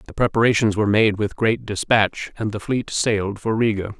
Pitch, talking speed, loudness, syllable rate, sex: 105 Hz, 195 wpm, -20 LUFS, 5.4 syllables/s, male